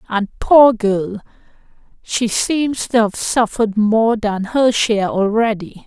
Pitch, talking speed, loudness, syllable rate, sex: 215 Hz, 135 wpm, -16 LUFS, 3.7 syllables/s, female